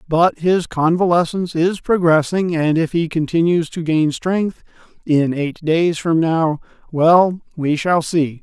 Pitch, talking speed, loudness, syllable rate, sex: 165 Hz, 140 wpm, -17 LUFS, 3.9 syllables/s, male